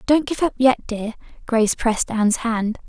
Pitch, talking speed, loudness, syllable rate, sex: 235 Hz, 190 wpm, -20 LUFS, 5.1 syllables/s, female